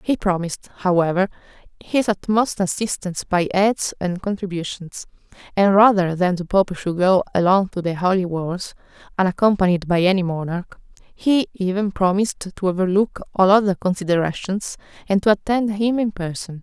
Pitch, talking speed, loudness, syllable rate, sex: 190 Hz, 145 wpm, -20 LUFS, 5.1 syllables/s, female